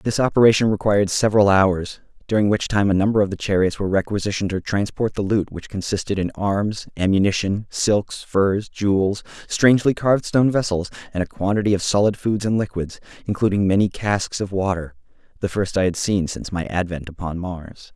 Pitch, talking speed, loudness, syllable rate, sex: 100 Hz, 180 wpm, -20 LUFS, 5.6 syllables/s, male